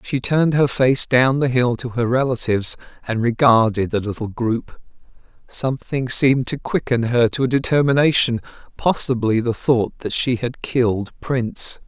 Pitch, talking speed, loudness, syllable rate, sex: 125 Hz, 155 wpm, -19 LUFS, 4.8 syllables/s, male